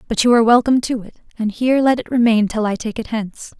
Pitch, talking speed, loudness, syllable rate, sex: 230 Hz, 265 wpm, -17 LUFS, 6.8 syllables/s, female